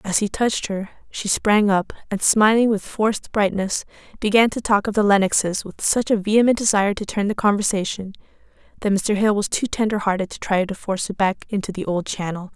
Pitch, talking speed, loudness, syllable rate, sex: 205 Hz, 210 wpm, -20 LUFS, 5.7 syllables/s, female